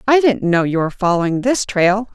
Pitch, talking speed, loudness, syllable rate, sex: 205 Hz, 225 wpm, -16 LUFS, 5.6 syllables/s, female